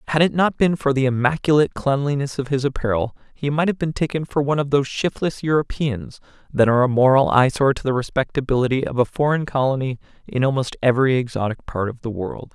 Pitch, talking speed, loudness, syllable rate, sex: 135 Hz, 200 wpm, -20 LUFS, 6.3 syllables/s, male